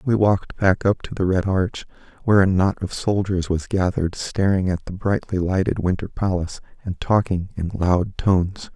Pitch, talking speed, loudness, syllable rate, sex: 95 Hz, 185 wpm, -21 LUFS, 5.0 syllables/s, male